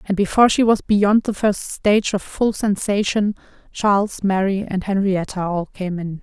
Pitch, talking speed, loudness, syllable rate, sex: 200 Hz, 175 wpm, -19 LUFS, 4.7 syllables/s, female